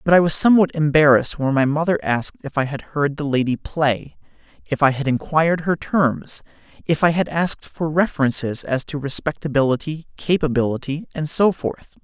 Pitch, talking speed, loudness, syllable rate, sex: 150 Hz, 175 wpm, -20 LUFS, 5.4 syllables/s, male